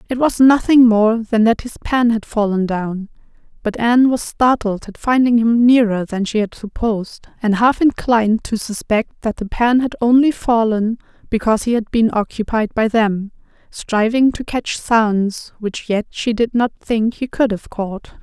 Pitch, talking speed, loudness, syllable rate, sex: 225 Hz, 180 wpm, -17 LUFS, 4.5 syllables/s, female